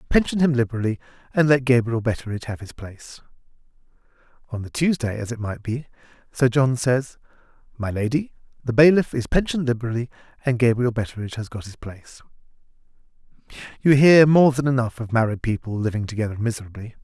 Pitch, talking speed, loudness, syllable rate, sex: 120 Hz, 160 wpm, -21 LUFS, 6.3 syllables/s, male